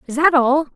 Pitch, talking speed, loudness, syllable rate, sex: 285 Hz, 240 wpm, -16 LUFS, 5.5 syllables/s, female